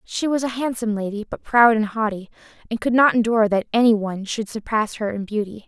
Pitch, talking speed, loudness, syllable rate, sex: 220 Hz, 220 wpm, -20 LUFS, 6.1 syllables/s, female